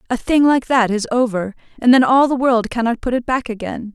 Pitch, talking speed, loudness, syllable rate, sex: 240 Hz, 245 wpm, -16 LUFS, 5.5 syllables/s, female